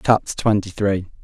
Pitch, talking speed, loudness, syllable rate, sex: 100 Hz, 145 wpm, -20 LUFS, 5.0 syllables/s, male